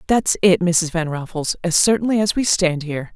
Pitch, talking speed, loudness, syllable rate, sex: 180 Hz, 210 wpm, -18 LUFS, 5.3 syllables/s, female